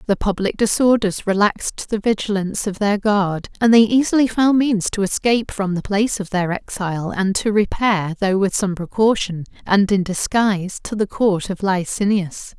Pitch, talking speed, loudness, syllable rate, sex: 200 Hz, 175 wpm, -19 LUFS, 4.9 syllables/s, female